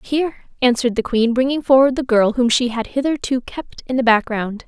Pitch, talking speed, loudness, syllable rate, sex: 250 Hz, 205 wpm, -18 LUFS, 5.6 syllables/s, female